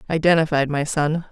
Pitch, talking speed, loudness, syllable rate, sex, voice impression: 155 Hz, 135 wpm, -20 LUFS, 5.5 syllables/s, female, feminine, adult-like, relaxed, slightly dark, soft, fluent, slightly raspy, intellectual, calm, friendly, reassuring, slightly kind, modest